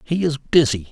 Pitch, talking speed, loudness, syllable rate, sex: 140 Hz, 195 wpm, -18 LUFS, 4.9 syllables/s, male